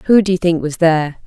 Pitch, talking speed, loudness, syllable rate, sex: 170 Hz, 285 wpm, -15 LUFS, 5.8 syllables/s, female